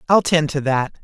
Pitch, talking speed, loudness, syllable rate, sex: 150 Hz, 230 wpm, -18 LUFS, 4.8 syllables/s, male